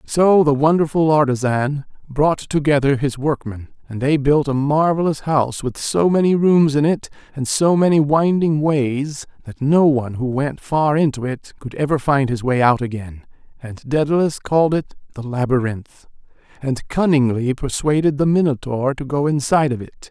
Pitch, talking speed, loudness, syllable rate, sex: 140 Hz, 165 wpm, -18 LUFS, 4.8 syllables/s, male